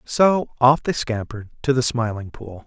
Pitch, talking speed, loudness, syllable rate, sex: 120 Hz, 180 wpm, -20 LUFS, 4.7 syllables/s, male